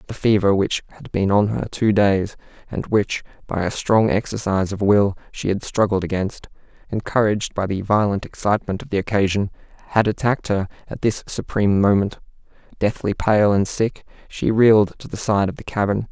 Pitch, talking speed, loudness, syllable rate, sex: 105 Hz, 170 wpm, -20 LUFS, 5.4 syllables/s, male